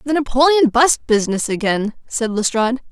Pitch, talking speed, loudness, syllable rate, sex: 245 Hz, 165 wpm, -17 LUFS, 5.6 syllables/s, female